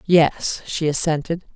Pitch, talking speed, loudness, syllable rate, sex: 160 Hz, 115 wpm, -20 LUFS, 3.8 syllables/s, female